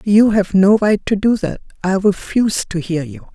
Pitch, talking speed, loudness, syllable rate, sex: 205 Hz, 215 wpm, -16 LUFS, 4.8 syllables/s, female